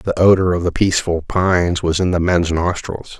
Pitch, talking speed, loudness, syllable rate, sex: 90 Hz, 205 wpm, -16 LUFS, 5.2 syllables/s, male